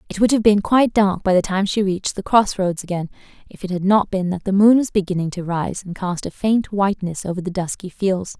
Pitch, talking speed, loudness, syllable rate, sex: 190 Hz, 255 wpm, -19 LUFS, 5.8 syllables/s, female